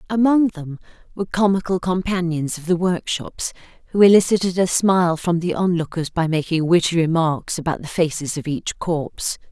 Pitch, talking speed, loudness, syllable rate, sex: 175 Hz, 160 wpm, -20 LUFS, 5.2 syllables/s, female